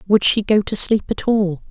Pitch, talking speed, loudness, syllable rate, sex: 205 Hz, 245 wpm, -17 LUFS, 4.6 syllables/s, female